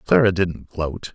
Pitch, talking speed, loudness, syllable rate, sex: 90 Hz, 155 wpm, -21 LUFS, 3.9 syllables/s, male